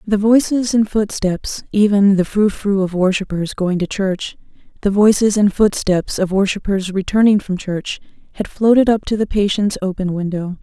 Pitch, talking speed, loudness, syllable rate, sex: 200 Hz, 170 wpm, -16 LUFS, 4.7 syllables/s, female